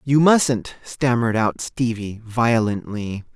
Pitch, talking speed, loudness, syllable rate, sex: 120 Hz, 105 wpm, -20 LUFS, 3.6 syllables/s, male